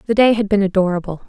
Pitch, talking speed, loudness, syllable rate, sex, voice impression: 200 Hz, 235 wpm, -16 LUFS, 7.3 syllables/s, female, feminine, adult-like, tensed, powerful, soft, clear, slightly fluent, intellectual, elegant, lively, slightly kind